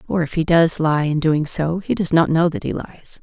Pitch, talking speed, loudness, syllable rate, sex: 160 Hz, 280 wpm, -18 LUFS, 4.9 syllables/s, female